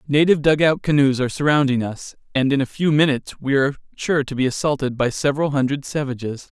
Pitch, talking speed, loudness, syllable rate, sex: 140 Hz, 180 wpm, -20 LUFS, 6.2 syllables/s, male